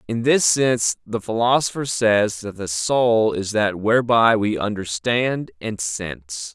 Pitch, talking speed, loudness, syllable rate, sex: 105 Hz, 145 wpm, -20 LUFS, 4.0 syllables/s, male